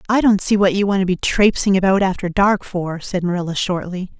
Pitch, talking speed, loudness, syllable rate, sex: 190 Hz, 230 wpm, -17 LUFS, 5.6 syllables/s, female